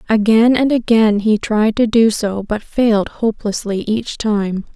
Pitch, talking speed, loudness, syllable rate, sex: 215 Hz, 165 wpm, -15 LUFS, 4.2 syllables/s, female